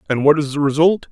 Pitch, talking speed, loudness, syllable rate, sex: 150 Hz, 270 wpm, -16 LUFS, 6.6 syllables/s, male